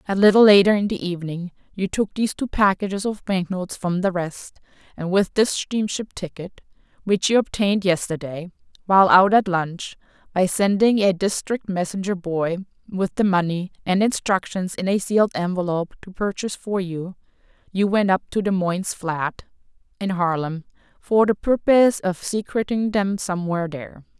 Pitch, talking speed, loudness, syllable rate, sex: 190 Hz, 155 wpm, -21 LUFS, 5.2 syllables/s, female